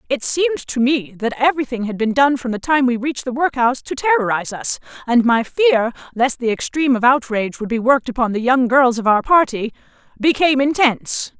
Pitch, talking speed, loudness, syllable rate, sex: 255 Hz, 205 wpm, -17 LUFS, 5.9 syllables/s, female